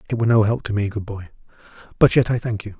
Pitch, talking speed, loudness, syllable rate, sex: 110 Hz, 280 wpm, -20 LUFS, 7.3 syllables/s, male